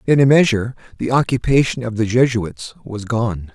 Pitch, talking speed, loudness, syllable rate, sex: 120 Hz, 170 wpm, -17 LUFS, 5.3 syllables/s, male